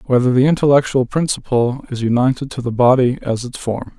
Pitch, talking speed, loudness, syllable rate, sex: 130 Hz, 180 wpm, -16 LUFS, 5.7 syllables/s, male